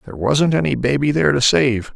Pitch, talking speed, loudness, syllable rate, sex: 130 Hz, 215 wpm, -16 LUFS, 5.9 syllables/s, male